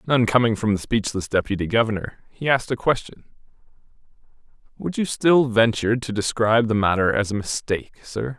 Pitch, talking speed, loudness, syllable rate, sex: 115 Hz, 165 wpm, -21 LUFS, 5.8 syllables/s, male